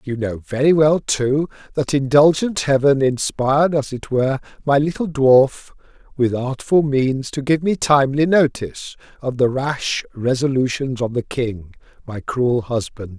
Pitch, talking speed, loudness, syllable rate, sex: 135 Hz, 150 wpm, -18 LUFS, 4.2 syllables/s, male